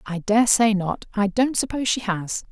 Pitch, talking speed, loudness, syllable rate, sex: 215 Hz, 190 wpm, -21 LUFS, 4.8 syllables/s, female